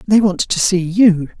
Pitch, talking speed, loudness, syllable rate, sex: 190 Hz, 215 wpm, -14 LUFS, 4.2 syllables/s, male